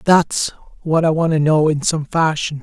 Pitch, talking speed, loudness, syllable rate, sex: 155 Hz, 205 wpm, -17 LUFS, 4.6 syllables/s, male